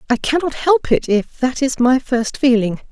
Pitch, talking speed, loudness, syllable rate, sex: 255 Hz, 205 wpm, -17 LUFS, 4.6 syllables/s, female